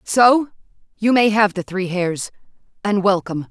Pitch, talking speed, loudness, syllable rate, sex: 200 Hz, 155 wpm, -18 LUFS, 4.6 syllables/s, female